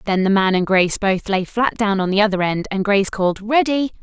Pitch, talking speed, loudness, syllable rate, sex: 200 Hz, 255 wpm, -18 LUFS, 5.9 syllables/s, female